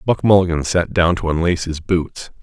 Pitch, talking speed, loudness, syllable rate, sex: 85 Hz, 200 wpm, -17 LUFS, 5.4 syllables/s, male